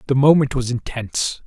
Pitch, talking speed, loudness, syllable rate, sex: 130 Hz, 165 wpm, -19 LUFS, 5.4 syllables/s, male